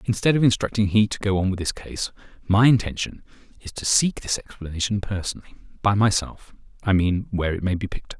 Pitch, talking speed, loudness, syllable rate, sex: 100 Hz, 190 wpm, -22 LUFS, 6.2 syllables/s, male